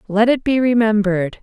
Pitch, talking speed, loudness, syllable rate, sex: 220 Hz, 170 wpm, -16 LUFS, 5.7 syllables/s, female